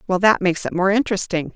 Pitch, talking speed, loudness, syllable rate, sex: 195 Hz, 230 wpm, -19 LUFS, 7.2 syllables/s, female